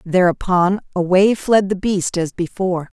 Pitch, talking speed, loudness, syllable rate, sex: 185 Hz, 140 wpm, -17 LUFS, 4.5 syllables/s, female